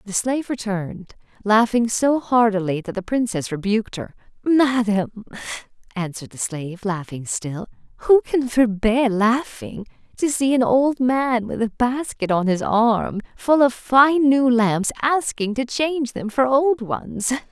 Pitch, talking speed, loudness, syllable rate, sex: 230 Hz, 150 wpm, -20 LUFS, 4.3 syllables/s, female